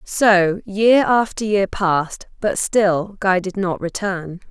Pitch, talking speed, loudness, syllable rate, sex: 195 Hz, 145 wpm, -18 LUFS, 3.4 syllables/s, female